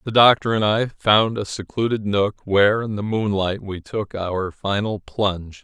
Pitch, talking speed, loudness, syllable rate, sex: 105 Hz, 180 wpm, -20 LUFS, 4.4 syllables/s, male